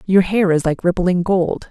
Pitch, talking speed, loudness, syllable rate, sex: 180 Hz, 210 wpm, -17 LUFS, 4.4 syllables/s, female